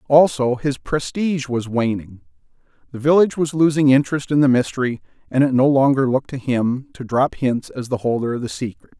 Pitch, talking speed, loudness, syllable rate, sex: 135 Hz, 195 wpm, -19 LUFS, 5.6 syllables/s, male